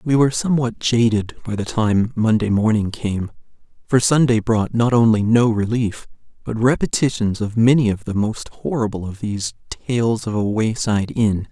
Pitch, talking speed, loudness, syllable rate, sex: 115 Hz, 165 wpm, -19 LUFS, 4.9 syllables/s, male